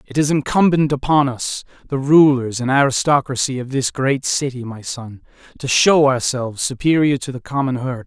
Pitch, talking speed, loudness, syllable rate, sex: 135 Hz, 170 wpm, -17 LUFS, 5.0 syllables/s, male